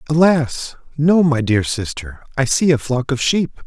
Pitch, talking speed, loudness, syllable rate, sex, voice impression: 140 Hz, 180 wpm, -17 LUFS, 4.3 syllables/s, male, masculine, adult-like, thick, tensed, powerful, slightly muffled, cool, calm, mature, friendly, reassuring, wild, lively, slightly strict